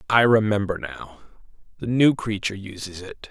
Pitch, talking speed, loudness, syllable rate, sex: 105 Hz, 145 wpm, -22 LUFS, 5.1 syllables/s, male